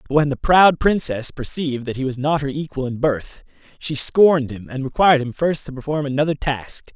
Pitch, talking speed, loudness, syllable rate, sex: 140 Hz, 215 wpm, -19 LUFS, 5.5 syllables/s, male